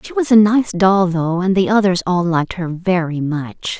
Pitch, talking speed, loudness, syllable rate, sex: 185 Hz, 220 wpm, -16 LUFS, 4.7 syllables/s, female